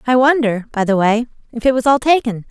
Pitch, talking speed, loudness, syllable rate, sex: 240 Hz, 240 wpm, -15 LUFS, 5.9 syllables/s, female